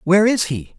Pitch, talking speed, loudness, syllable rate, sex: 190 Hz, 230 wpm, -17 LUFS, 5.9 syllables/s, male